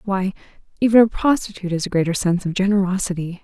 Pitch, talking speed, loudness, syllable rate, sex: 190 Hz, 175 wpm, -19 LUFS, 7.1 syllables/s, female